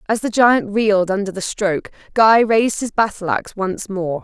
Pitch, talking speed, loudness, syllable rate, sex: 205 Hz, 200 wpm, -17 LUFS, 5.2 syllables/s, female